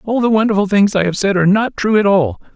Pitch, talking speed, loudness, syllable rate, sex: 200 Hz, 280 wpm, -14 LUFS, 6.4 syllables/s, male